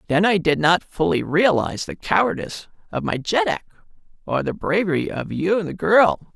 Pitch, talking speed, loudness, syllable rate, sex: 160 Hz, 180 wpm, -20 LUFS, 5.4 syllables/s, male